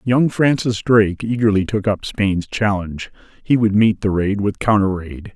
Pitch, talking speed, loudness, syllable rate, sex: 105 Hz, 180 wpm, -17 LUFS, 4.7 syllables/s, male